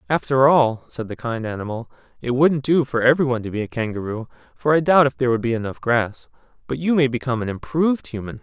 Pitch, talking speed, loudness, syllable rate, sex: 130 Hz, 230 wpm, -20 LUFS, 6.5 syllables/s, male